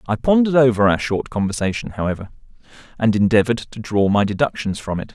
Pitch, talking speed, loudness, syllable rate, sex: 110 Hz, 175 wpm, -19 LUFS, 6.5 syllables/s, male